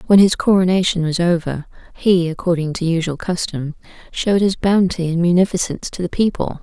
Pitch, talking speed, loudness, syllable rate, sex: 175 Hz, 165 wpm, -17 LUFS, 5.6 syllables/s, female